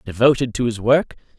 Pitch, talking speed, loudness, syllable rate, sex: 125 Hz, 175 wpm, -18 LUFS, 5.6 syllables/s, male